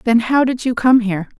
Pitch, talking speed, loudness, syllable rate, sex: 235 Hz, 255 wpm, -15 LUFS, 5.9 syllables/s, female